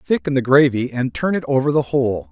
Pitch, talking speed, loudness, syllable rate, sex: 135 Hz, 235 wpm, -18 LUFS, 6.0 syllables/s, male